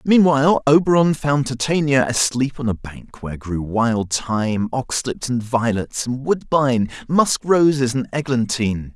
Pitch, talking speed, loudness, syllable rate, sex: 130 Hz, 140 wpm, -19 LUFS, 4.4 syllables/s, male